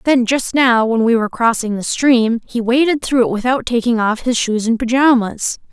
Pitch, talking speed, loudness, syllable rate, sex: 240 Hz, 210 wpm, -15 LUFS, 5.0 syllables/s, female